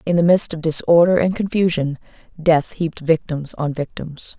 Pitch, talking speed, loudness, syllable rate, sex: 165 Hz, 165 wpm, -18 LUFS, 4.9 syllables/s, female